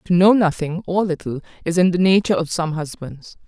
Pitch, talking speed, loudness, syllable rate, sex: 170 Hz, 205 wpm, -19 LUFS, 5.6 syllables/s, female